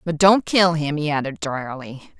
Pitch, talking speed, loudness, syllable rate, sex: 160 Hz, 190 wpm, -19 LUFS, 4.4 syllables/s, female